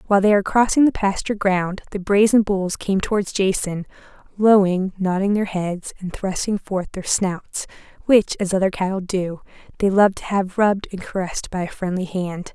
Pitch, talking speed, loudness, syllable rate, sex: 195 Hz, 180 wpm, -20 LUFS, 5.3 syllables/s, female